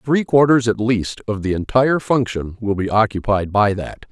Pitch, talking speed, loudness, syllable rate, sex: 110 Hz, 190 wpm, -18 LUFS, 4.9 syllables/s, male